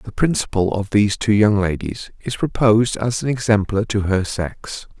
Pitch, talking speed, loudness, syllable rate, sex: 105 Hz, 180 wpm, -19 LUFS, 4.8 syllables/s, male